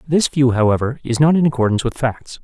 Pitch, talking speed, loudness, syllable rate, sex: 130 Hz, 220 wpm, -17 LUFS, 6.2 syllables/s, male